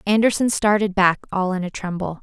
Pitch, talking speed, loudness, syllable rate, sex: 195 Hz, 190 wpm, -20 LUFS, 5.6 syllables/s, female